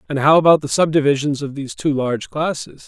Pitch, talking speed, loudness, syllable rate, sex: 145 Hz, 210 wpm, -17 LUFS, 6.3 syllables/s, male